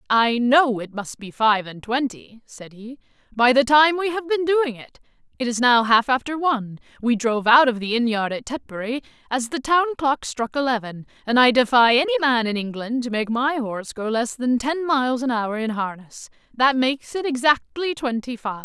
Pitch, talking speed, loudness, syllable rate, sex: 250 Hz, 210 wpm, -21 LUFS, 5.1 syllables/s, female